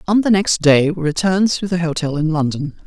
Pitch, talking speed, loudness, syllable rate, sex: 170 Hz, 230 wpm, -17 LUFS, 5.6 syllables/s, male